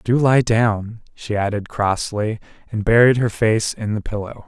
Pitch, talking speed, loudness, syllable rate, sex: 110 Hz, 175 wpm, -19 LUFS, 4.3 syllables/s, male